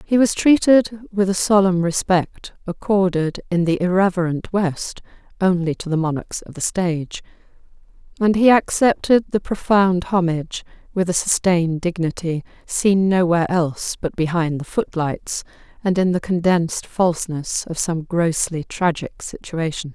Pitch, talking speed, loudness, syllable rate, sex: 180 Hz, 140 wpm, -19 LUFS, 4.6 syllables/s, female